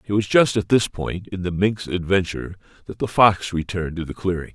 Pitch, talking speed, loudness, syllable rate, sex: 95 Hz, 225 wpm, -21 LUFS, 5.7 syllables/s, male